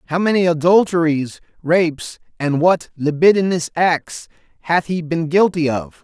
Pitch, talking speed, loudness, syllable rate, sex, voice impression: 165 Hz, 130 wpm, -17 LUFS, 4.5 syllables/s, male, very masculine, middle-aged, thick, tensed, powerful, bright, soft, slightly clear, fluent, slightly halting, slightly raspy, cool, intellectual, slightly refreshing, sincere, calm, mature, slightly friendly, slightly reassuring, slightly unique, slightly elegant, wild, slightly sweet, lively, kind, slightly strict, slightly intense, slightly sharp